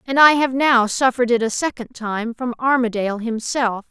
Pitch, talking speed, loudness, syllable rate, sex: 240 Hz, 185 wpm, -18 LUFS, 5.1 syllables/s, female